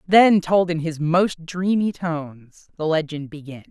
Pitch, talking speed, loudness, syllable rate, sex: 165 Hz, 160 wpm, -21 LUFS, 4.1 syllables/s, female